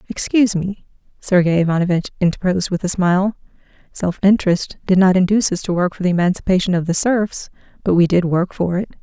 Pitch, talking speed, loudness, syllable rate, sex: 185 Hz, 185 wpm, -17 LUFS, 6.3 syllables/s, female